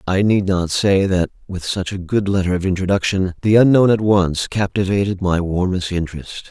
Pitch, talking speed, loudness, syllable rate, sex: 95 Hz, 185 wpm, -17 LUFS, 5.1 syllables/s, male